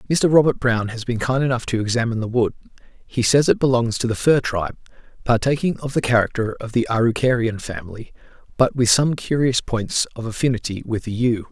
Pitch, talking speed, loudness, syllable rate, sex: 120 Hz, 195 wpm, -20 LUFS, 5.9 syllables/s, male